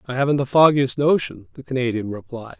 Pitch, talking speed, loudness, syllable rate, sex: 135 Hz, 185 wpm, -19 LUFS, 5.9 syllables/s, male